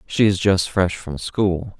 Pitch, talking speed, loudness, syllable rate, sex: 90 Hz, 200 wpm, -20 LUFS, 3.6 syllables/s, male